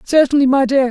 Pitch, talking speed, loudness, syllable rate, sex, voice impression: 270 Hz, 200 wpm, -13 LUFS, 5.8 syllables/s, female, feminine, adult-like, powerful, slightly bright, slightly soft, halting, intellectual, elegant, lively, slightly intense, slightly sharp